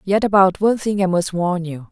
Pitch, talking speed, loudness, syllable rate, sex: 185 Hz, 250 wpm, -18 LUFS, 5.6 syllables/s, female